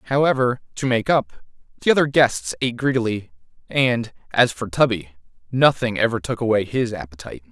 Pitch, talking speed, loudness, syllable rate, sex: 125 Hz, 150 wpm, -20 LUFS, 5.5 syllables/s, male